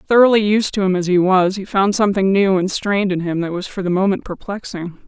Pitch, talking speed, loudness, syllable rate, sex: 190 Hz, 250 wpm, -17 LUFS, 6.0 syllables/s, female